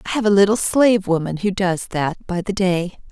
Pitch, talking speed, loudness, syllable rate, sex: 190 Hz, 230 wpm, -18 LUFS, 5.1 syllables/s, female